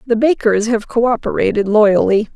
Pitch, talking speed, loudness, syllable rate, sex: 225 Hz, 155 wpm, -14 LUFS, 5.0 syllables/s, female